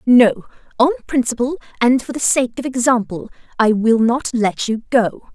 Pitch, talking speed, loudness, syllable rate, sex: 240 Hz, 170 wpm, -17 LUFS, 4.7 syllables/s, female